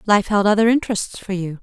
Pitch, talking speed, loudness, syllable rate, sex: 205 Hz, 220 wpm, -18 LUFS, 6.1 syllables/s, female